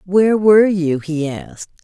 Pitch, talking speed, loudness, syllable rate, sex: 180 Hz, 165 wpm, -15 LUFS, 5.0 syllables/s, female